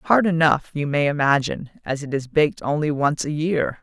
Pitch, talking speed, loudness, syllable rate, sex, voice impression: 150 Hz, 205 wpm, -21 LUFS, 5.3 syllables/s, female, feminine, adult-like, slightly thick, tensed, powerful, slightly hard, clear, slightly raspy, intellectual, friendly, reassuring, lively